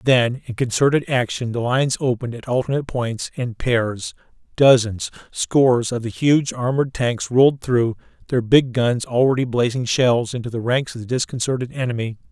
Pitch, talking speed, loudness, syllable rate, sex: 125 Hz, 165 wpm, -20 LUFS, 5.2 syllables/s, male